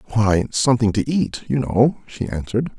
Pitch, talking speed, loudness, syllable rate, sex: 115 Hz, 150 wpm, -20 LUFS, 5.3 syllables/s, male